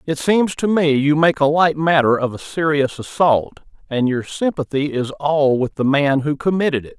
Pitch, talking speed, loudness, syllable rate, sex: 145 Hz, 205 wpm, -18 LUFS, 4.7 syllables/s, male